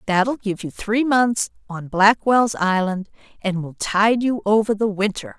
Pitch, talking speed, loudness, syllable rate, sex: 205 Hz, 165 wpm, -20 LUFS, 4.0 syllables/s, female